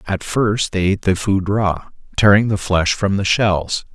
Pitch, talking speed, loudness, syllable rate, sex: 100 Hz, 200 wpm, -17 LUFS, 4.5 syllables/s, male